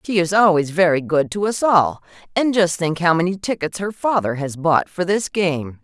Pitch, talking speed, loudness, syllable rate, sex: 175 Hz, 215 wpm, -19 LUFS, 4.9 syllables/s, female